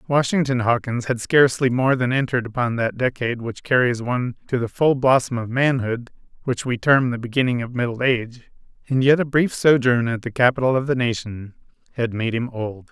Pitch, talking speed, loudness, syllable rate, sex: 125 Hz, 195 wpm, -20 LUFS, 5.6 syllables/s, male